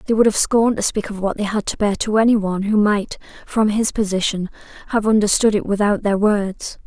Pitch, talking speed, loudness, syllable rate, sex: 205 Hz, 225 wpm, -18 LUFS, 5.7 syllables/s, female